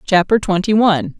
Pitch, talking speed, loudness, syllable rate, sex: 195 Hz, 150 wpm, -15 LUFS, 5.2 syllables/s, female